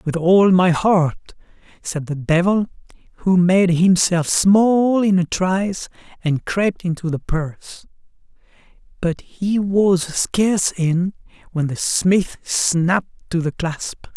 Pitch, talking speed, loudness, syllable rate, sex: 180 Hz, 130 wpm, -18 LUFS, 3.6 syllables/s, male